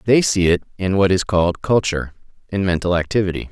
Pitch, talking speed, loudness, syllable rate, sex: 95 Hz, 170 wpm, -18 LUFS, 6.3 syllables/s, male